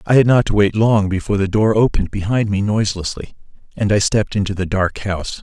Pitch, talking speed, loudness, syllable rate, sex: 105 Hz, 220 wpm, -17 LUFS, 6.4 syllables/s, male